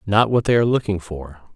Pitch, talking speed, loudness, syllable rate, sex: 100 Hz, 230 wpm, -19 LUFS, 6.1 syllables/s, male